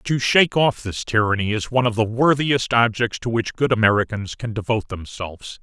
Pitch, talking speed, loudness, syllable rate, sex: 115 Hz, 190 wpm, -20 LUFS, 5.6 syllables/s, male